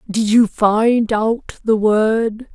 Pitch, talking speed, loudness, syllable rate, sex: 220 Hz, 140 wpm, -16 LUFS, 2.6 syllables/s, female